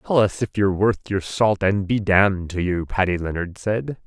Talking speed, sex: 220 wpm, male